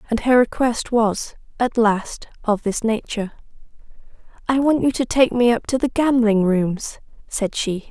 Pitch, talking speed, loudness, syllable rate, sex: 230 Hz, 165 wpm, -19 LUFS, 4.4 syllables/s, female